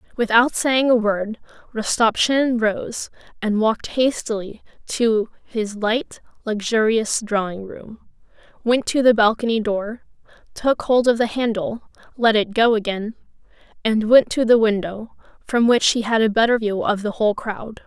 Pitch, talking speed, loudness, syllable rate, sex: 225 Hz, 150 wpm, -19 LUFS, 4.4 syllables/s, female